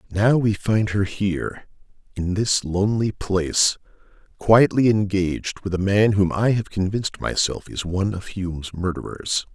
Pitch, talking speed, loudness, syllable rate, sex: 100 Hz, 150 wpm, -21 LUFS, 4.7 syllables/s, male